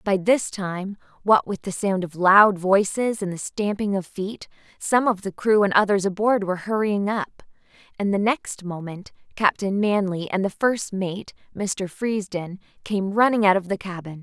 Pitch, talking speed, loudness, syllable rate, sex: 200 Hz, 180 wpm, -22 LUFS, 4.4 syllables/s, female